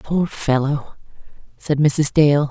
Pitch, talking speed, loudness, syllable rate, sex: 145 Hz, 120 wpm, -18 LUFS, 3.3 syllables/s, female